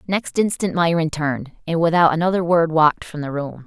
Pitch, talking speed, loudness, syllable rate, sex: 165 Hz, 195 wpm, -19 LUFS, 5.6 syllables/s, female